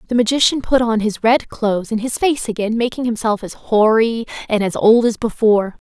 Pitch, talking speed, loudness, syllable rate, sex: 225 Hz, 205 wpm, -17 LUFS, 5.4 syllables/s, female